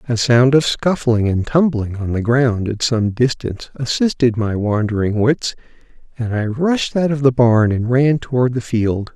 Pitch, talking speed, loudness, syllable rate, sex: 120 Hz, 185 wpm, -17 LUFS, 4.5 syllables/s, male